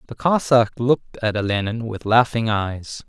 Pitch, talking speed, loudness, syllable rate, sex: 115 Hz, 155 wpm, -20 LUFS, 4.7 syllables/s, male